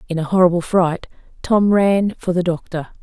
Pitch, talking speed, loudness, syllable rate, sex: 180 Hz, 180 wpm, -17 LUFS, 5.1 syllables/s, female